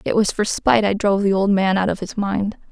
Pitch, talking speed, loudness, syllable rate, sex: 200 Hz, 285 wpm, -19 LUFS, 6.0 syllables/s, female